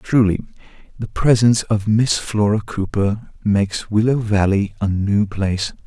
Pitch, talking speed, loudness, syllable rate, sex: 105 Hz, 135 wpm, -18 LUFS, 4.4 syllables/s, male